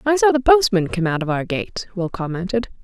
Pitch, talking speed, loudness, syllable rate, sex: 210 Hz, 235 wpm, -19 LUFS, 5.5 syllables/s, female